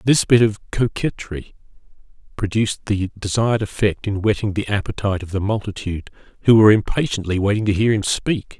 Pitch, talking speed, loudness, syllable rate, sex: 105 Hz, 160 wpm, -19 LUFS, 5.8 syllables/s, male